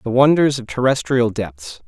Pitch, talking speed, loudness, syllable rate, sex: 120 Hz, 160 wpm, -17 LUFS, 4.6 syllables/s, male